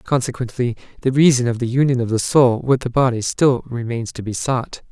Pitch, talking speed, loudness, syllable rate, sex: 125 Hz, 210 wpm, -18 LUFS, 5.4 syllables/s, male